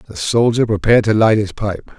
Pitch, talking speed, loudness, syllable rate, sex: 105 Hz, 210 wpm, -15 LUFS, 5.8 syllables/s, male